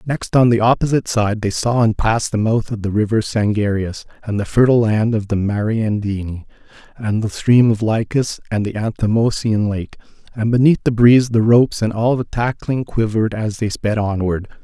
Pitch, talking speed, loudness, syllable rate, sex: 110 Hz, 190 wpm, -17 LUFS, 5.2 syllables/s, male